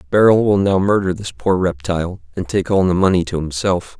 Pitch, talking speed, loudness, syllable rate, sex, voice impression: 90 Hz, 210 wpm, -17 LUFS, 5.5 syllables/s, male, masculine, adult-like, slightly tensed, slightly dark, slightly hard, fluent, cool, sincere, calm, slightly reassuring, wild, modest